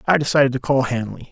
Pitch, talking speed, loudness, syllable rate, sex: 135 Hz, 230 wpm, -19 LUFS, 6.8 syllables/s, male